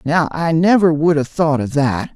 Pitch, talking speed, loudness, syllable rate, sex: 155 Hz, 225 wpm, -16 LUFS, 4.5 syllables/s, male